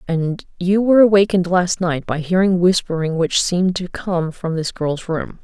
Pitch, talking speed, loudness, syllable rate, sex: 175 Hz, 190 wpm, -18 LUFS, 4.7 syllables/s, female